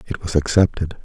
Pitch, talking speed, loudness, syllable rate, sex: 85 Hz, 175 wpm, -19 LUFS, 5.7 syllables/s, male